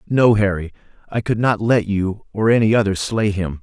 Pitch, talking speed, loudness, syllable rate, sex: 105 Hz, 200 wpm, -18 LUFS, 5.0 syllables/s, male